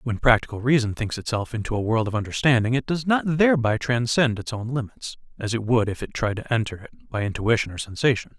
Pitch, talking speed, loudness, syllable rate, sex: 120 Hz, 220 wpm, -23 LUFS, 6.0 syllables/s, male